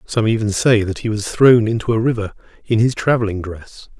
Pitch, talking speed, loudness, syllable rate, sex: 110 Hz, 210 wpm, -17 LUFS, 5.4 syllables/s, male